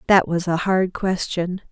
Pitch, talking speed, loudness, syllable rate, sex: 180 Hz, 175 wpm, -21 LUFS, 4.1 syllables/s, female